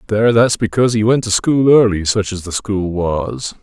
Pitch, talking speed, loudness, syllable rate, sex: 105 Hz, 215 wpm, -15 LUFS, 5.0 syllables/s, male